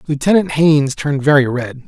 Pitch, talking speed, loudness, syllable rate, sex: 145 Hz, 160 wpm, -14 LUFS, 6.0 syllables/s, male